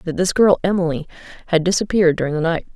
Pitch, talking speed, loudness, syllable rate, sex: 175 Hz, 195 wpm, -18 LUFS, 6.9 syllables/s, female